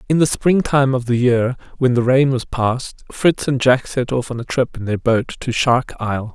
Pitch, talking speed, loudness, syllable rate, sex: 125 Hz, 245 wpm, -18 LUFS, 4.7 syllables/s, male